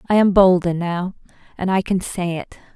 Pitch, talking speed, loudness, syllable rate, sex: 185 Hz, 195 wpm, -19 LUFS, 5.1 syllables/s, female